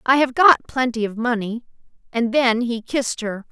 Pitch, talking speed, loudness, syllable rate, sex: 240 Hz, 190 wpm, -19 LUFS, 5.0 syllables/s, female